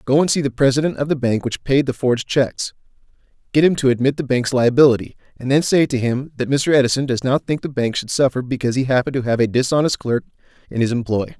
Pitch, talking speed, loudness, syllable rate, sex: 130 Hz, 240 wpm, -18 LUFS, 6.4 syllables/s, male